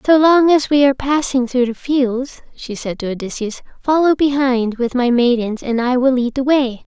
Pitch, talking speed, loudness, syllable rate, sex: 255 Hz, 205 wpm, -16 LUFS, 4.8 syllables/s, female